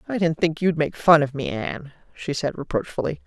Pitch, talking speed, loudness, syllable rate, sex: 155 Hz, 220 wpm, -22 LUFS, 5.7 syllables/s, female